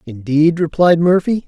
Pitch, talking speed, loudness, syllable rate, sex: 165 Hz, 120 wpm, -14 LUFS, 4.4 syllables/s, male